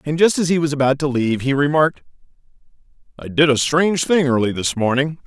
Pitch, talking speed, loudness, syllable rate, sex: 145 Hz, 205 wpm, -17 LUFS, 6.3 syllables/s, male